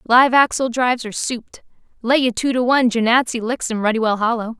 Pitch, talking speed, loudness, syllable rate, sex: 240 Hz, 210 wpm, -17 LUFS, 6.1 syllables/s, female